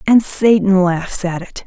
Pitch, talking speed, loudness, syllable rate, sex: 190 Hz, 180 wpm, -14 LUFS, 3.9 syllables/s, female